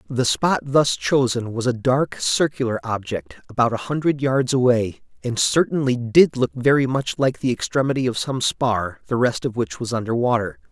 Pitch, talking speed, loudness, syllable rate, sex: 125 Hz, 185 wpm, -20 LUFS, 4.9 syllables/s, male